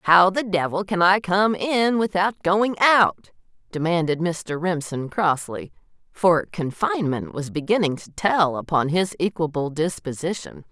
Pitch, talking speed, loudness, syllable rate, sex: 175 Hz, 135 wpm, -21 LUFS, 4.3 syllables/s, female